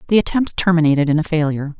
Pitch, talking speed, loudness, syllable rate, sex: 160 Hz, 200 wpm, -17 LUFS, 7.6 syllables/s, female